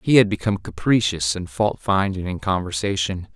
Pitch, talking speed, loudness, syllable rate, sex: 95 Hz, 160 wpm, -21 LUFS, 5.3 syllables/s, male